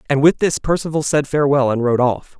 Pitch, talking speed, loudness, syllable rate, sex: 140 Hz, 225 wpm, -17 LUFS, 6.0 syllables/s, male